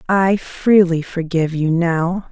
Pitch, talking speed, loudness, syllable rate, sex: 175 Hz, 130 wpm, -17 LUFS, 3.8 syllables/s, female